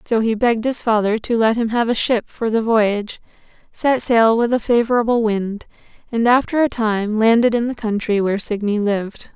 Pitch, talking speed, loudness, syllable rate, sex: 225 Hz, 200 wpm, -18 LUFS, 5.2 syllables/s, female